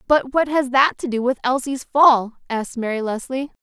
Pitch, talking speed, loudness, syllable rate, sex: 255 Hz, 200 wpm, -19 LUFS, 5.0 syllables/s, female